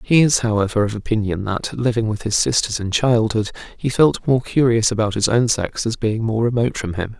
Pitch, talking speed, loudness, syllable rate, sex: 115 Hz, 215 wpm, -19 LUFS, 5.4 syllables/s, male